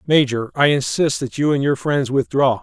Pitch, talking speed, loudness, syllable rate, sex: 140 Hz, 205 wpm, -18 LUFS, 4.9 syllables/s, male